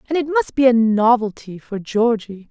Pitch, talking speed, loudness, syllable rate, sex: 235 Hz, 190 wpm, -17 LUFS, 4.7 syllables/s, female